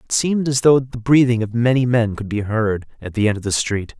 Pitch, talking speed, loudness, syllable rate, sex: 120 Hz, 270 wpm, -18 LUFS, 5.7 syllables/s, male